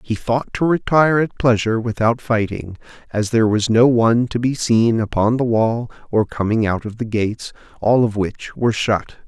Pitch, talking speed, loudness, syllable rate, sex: 115 Hz, 195 wpm, -18 LUFS, 5.1 syllables/s, male